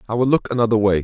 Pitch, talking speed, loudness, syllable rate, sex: 115 Hz, 290 wpm, -18 LUFS, 7.8 syllables/s, male